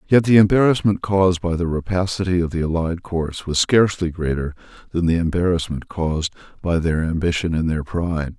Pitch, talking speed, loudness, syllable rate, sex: 85 Hz, 170 wpm, -20 LUFS, 5.6 syllables/s, male